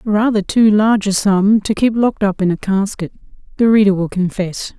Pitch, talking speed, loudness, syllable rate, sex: 205 Hz, 200 wpm, -15 LUFS, 5.2 syllables/s, female